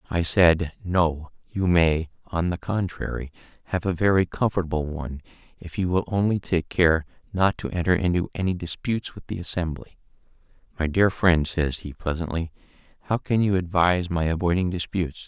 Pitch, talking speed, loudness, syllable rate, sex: 85 Hz, 160 wpm, -24 LUFS, 5.2 syllables/s, male